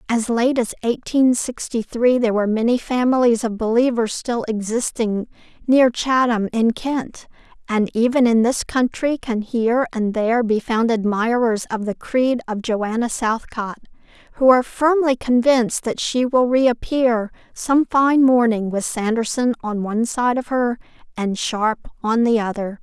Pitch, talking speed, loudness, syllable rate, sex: 235 Hz, 160 wpm, -19 LUFS, 4.5 syllables/s, female